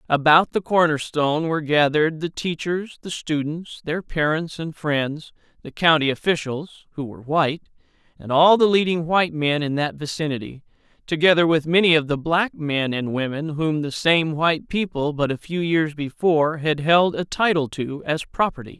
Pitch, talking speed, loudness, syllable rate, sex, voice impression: 155 Hz, 170 wpm, -21 LUFS, 5.1 syllables/s, male, very masculine, very middle-aged, very thick, very tensed, bright, soft, very clear, fluent, cool, intellectual, very refreshing, sincere, very calm, friendly, reassuring, unique, elegant, slightly wild, sweet, lively, kind